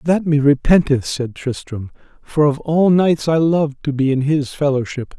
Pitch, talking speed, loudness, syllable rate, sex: 145 Hz, 185 wpm, -17 LUFS, 4.7 syllables/s, male